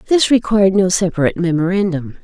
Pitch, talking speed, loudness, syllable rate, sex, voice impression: 185 Hz, 135 wpm, -15 LUFS, 6.5 syllables/s, female, feminine, adult-like, slightly sincere, calm, friendly, reassuring